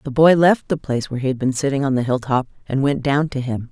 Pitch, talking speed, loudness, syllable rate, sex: 135 Hz, 290 wpm, -19 LUFS, 6.5 syllables/s, female